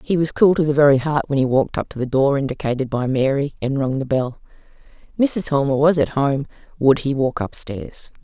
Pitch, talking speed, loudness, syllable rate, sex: 140 Hz, 225 wpm, -19 LUFS, 5.5 syllables/s, female